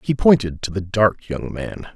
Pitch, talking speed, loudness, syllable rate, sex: 105 Hz, 215 wpm, -20 LUFS, 4.5 syllables/s, male